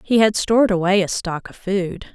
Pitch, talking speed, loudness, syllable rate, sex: 195 Hz, 225 wpm, -19 LUFS, 4.9 syllables/s, female